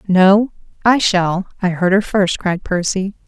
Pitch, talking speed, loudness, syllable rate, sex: 190 Hz, 145 wpm, -16 LUFS, 3.9 syllables/s, female